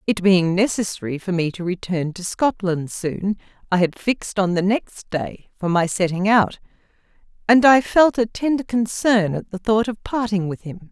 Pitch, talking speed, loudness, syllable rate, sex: 200 Hz, 185 wpm, -20 LUFS, 4.6 syllables/s, female